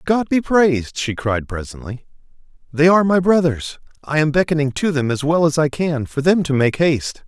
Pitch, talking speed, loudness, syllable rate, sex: 150 Hz, 205 wpm, -17 LUFS, 5.3 syllables/s, male